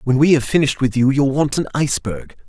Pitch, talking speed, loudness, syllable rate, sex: 135 Hz, 240 wpm, -17 LUFS, 6.3 syllables/s, male